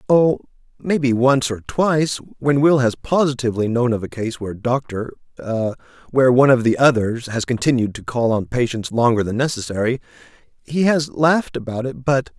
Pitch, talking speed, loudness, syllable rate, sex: 125 Hz, 165 wpm, -19 LUFS, 5.4 syllables/s, male